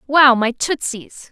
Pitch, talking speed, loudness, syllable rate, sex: 260 Hz, 135 wpm, -16 LUFS, 3.4 syllables/s, female